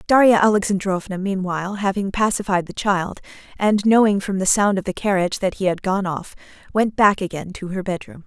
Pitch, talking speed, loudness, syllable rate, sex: 195 Hz, 190 wpm, -20 LUFS, 5.6 syllables/s, female